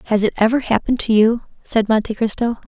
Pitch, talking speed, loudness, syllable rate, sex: 225 Hz, 200 wpm, -18 LUFS, 6.3 syllables/s, female